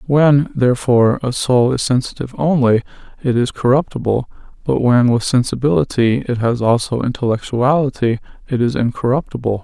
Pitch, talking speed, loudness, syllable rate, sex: 125 Hz, 130 wpm, -16 LUFS, 5.4 syllables/s, male